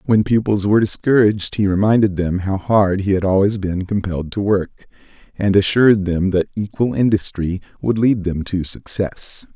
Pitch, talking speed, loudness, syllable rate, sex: 100 Hz, 170 wpm, -17 LUFS, 5.1 syllables/s, male